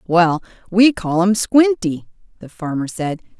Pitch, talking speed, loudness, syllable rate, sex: 190 Hz, 140 wpm, -17 LUFS, 4.0 syllables/s, female